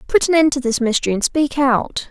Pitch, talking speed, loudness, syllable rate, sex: 270 Hz, 255 wpm, -17 LUFS, 5.6 syllables/s, female